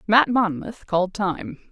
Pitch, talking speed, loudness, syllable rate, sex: 200 Hz, 140 wpm, -22 LUFS, 4.1 syllables/s, female